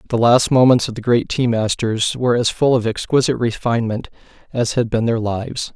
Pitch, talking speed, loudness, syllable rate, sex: 120 Hz, 200 wpm, -17 LUFS, 5.7 syllables/s, male